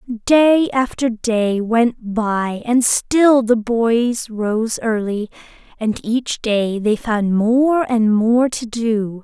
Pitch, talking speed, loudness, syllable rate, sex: 230 Hz, 135 wpm, -17 LUFS, 2.7 syllables/s, female